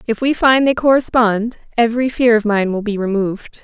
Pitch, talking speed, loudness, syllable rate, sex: 230 Hz, 200 wpm, -15 LUFS, 5.5 syllables/s, female